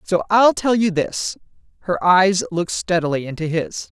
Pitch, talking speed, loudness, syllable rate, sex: 190 Hz, 165 wpm, -18 LUFS, 4.8 syllables/s, female